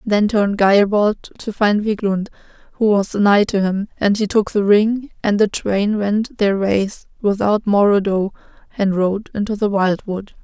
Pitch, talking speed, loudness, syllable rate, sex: 205 Hz, 180 wpm, -17 LUFS, 4.3 syllables/s, female